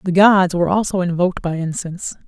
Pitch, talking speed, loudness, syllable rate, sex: 180 Hz, 185 wpm, -17 LUFS, 6.2 syllables/s, female